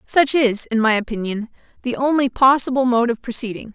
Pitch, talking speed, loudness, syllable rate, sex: 245 Hz, 175 wpm, -18 LUFS, 5.5 syllables/s, female